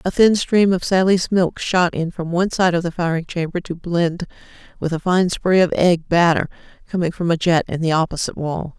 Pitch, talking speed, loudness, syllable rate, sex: 175 Hz, 220 wpm, -18 LUFS, 5.3 syllables/s, female